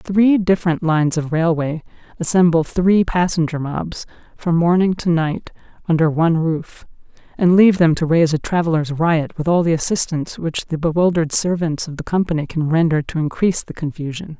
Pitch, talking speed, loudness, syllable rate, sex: 165 Hz, 170 wpm, -18 LUFS, 5.5 syllables/s, female